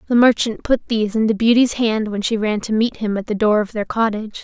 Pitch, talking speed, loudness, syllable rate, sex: 220 Hz, 255 wpm, -18 LUFS, 5.9 syllables/s, female